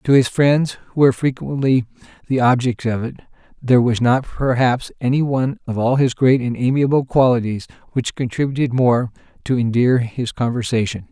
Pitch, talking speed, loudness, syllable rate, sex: 125 Hz, 160 wpm, -18 LUFS, 5.3 syllables/s, male